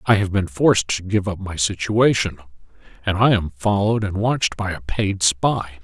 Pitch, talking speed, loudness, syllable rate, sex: 100 Hz, 195 wpm, -20 LUFS, 5.1 syllables/s, male